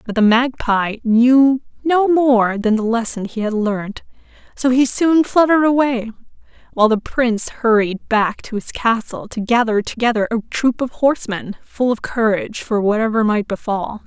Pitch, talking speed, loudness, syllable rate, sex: 235 Hz, 165 wpm, -17 LUFS, 4.7 syllables/s, female